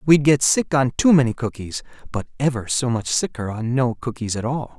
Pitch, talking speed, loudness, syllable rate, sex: 130 Hz, 215 wpm, -20 LUFS, 5.2 syllables/s, male